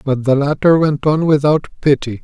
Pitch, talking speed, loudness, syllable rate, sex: 145 Hz, 190 wpm, -14 LUFS, 5.0 syllables/s, male